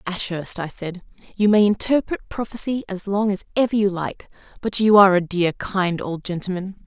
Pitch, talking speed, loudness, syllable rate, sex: 195 Hz, 185 wpm, -21 LUFS, 5.2 syllables/s, female